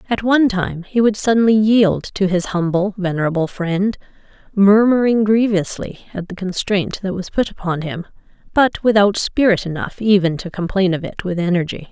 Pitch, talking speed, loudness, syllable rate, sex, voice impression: 195 Hz, 165 wpm, -17 LUFS, 5.1 syllables/s, female, feminine, adult-like, slightly relaxed, powerful, slightly muffled, raspy, slightly friendly, unique, lively, slightly strict, slightly intense, sharp